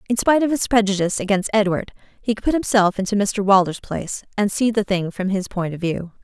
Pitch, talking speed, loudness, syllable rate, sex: 205 Hz, 230 wpm, -20 LUFS, 6.2 syllables/s, female